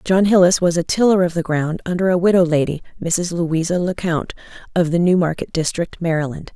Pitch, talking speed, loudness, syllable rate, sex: 175 Hz, 200 wpm, -18 LUFS, 5.2 syllables/s, female